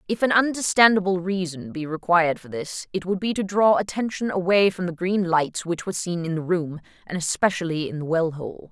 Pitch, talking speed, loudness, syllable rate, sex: 180 Hz, 215 wpm, -23 LUFS, 5.5 syllables/s, female